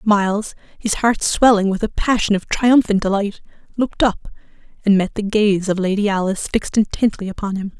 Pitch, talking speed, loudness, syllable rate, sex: 205 Hz, 175 wpm, -18 LUFS, 5.5 syllables/s, female